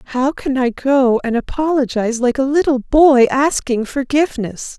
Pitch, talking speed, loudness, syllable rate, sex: 265 Hz, 150 wpm, -16 LUFS, 4.5 syllables/s, female